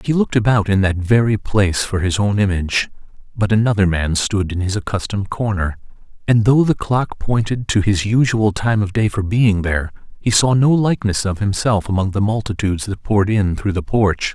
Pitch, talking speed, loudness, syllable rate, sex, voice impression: 105 Hz, 200 wpm, -17 LUFS, 5.4 syllables/s, male, masculine, middle-aged, tensed, powerful, slightly soft, clear, raspy, cool, calm, mature, friendly, reassuring, wild, lively, slightly strict